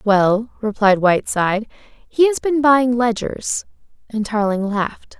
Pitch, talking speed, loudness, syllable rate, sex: 225 Hz, 125 wpm, -18 LUFS, 4.0 syllables/s, female